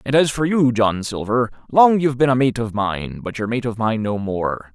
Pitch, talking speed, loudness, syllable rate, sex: 120 Hz, 255 wpm, -19 LUFS, 5.2 syllables/s, male